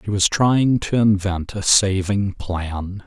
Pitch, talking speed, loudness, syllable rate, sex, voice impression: 100 Hz, 155 wpm, -19 LUFS, 3.4 syllables/s, male, masculine, slightly old, slightly relaxed, powerful, hard, raspy, mature, reassuring, wild, slightly lively, slightly strict